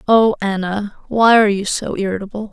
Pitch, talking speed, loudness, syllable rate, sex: 205 Hz, 165 wpm, -16 LUFS, 5.6 syllables/s, female